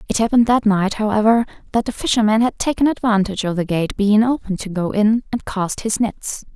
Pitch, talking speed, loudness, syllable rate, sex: 215 Hz, 210 wpm, -18 LUFS, 5.7 syllables/s, female